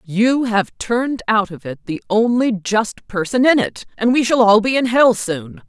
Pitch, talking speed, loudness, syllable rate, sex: 225 Hz, 210 wpm, -17 LUFS, 4.4 syllables/s, female